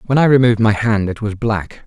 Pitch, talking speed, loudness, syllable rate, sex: 110 Hz, 260 wpm, -15 LUFS, 5.9 syllables/s, male